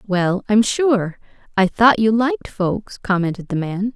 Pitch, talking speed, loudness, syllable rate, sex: 210 Hz, 150 wpm, -18 LUFS, 4.1 syllables/s, female